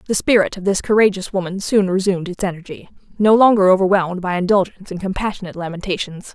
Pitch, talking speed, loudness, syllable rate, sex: 190 Hz, 170 wpm, -17 LUFS, 6.8 syllables/s, female